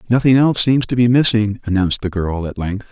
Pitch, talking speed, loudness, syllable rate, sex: 110 Hz, 225 wpm, -16 LUFS, 6.1 syllables/s, male